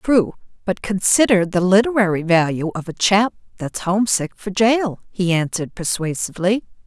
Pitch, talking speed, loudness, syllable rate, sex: 195 Hz, 130 wpm, -18 LUFS, 5.0 syllables/s, female